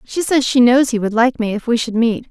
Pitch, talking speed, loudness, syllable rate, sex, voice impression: 245 Hz, 310 wpm, -15 LUFS, 5.5 syllables/s, female, very feminine, slightly young, adult-like, very thin, very tensed, powerful, very bright, slightly hard, very clear, very fluent, very cute, intellectual, very refreshing, sincere, slightly calm, very friendly, reassuring, very unique, elegant, slightly wild, very sweet, lively, slightly kind, intense, slightly sharp, slightly modest, very light